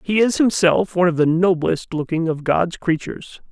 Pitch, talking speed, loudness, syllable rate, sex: 175 Hz, 190 wpm, -18 LUFS, 5.1 syllables/s, male